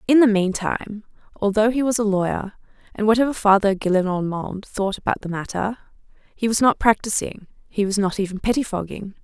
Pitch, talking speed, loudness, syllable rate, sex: 205 Hz, 160 wpm, -21 LUFS, 5.6 syllables/s, female